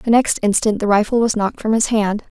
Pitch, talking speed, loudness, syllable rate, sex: 215 Hz, 250 wpm, -17 LUFS, 6.0 syllables/s, female